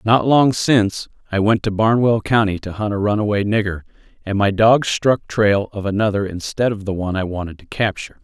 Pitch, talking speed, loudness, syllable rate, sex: 105 Hz, 205 wpm, -18 LUFS, 5.5 syllables/s, male